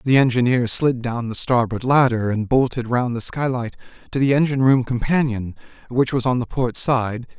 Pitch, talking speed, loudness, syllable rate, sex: 125 Hz, 185 wpm, -20 LUFS, 5.1 syllables/s, male